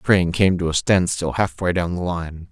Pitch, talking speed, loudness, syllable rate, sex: 90 Hz, 240 wpm, -20 LUFS, 5.3 syllables/s, male